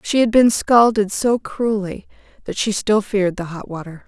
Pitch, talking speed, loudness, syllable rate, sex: 205 Hz, 190 wpm, -18 LUFS, 4.8 syllables/s, female